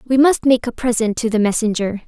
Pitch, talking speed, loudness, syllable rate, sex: 235 Hz, 230 wpm, -17 LUFS, 5.7 syllables/s, female